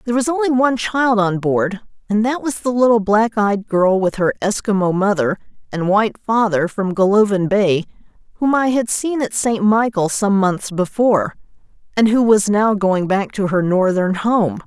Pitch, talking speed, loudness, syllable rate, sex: 210 Hz, 185 wpm, -17 LUFS, 4.7 syllables/s, female